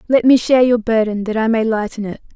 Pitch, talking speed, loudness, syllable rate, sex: 225 Hz, 255 wpm, -15 LUFS, 6.3 syllables/s, female